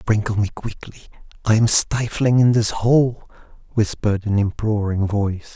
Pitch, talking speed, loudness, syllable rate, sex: 110 Hz, 140 wpm, -19 LUFS, 4.7 syllables/s, male